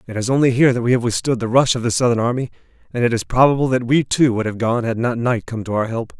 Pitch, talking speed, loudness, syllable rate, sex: 120 Hz, 300 wpm, -18 LUFS, 6.8 syllables/s, male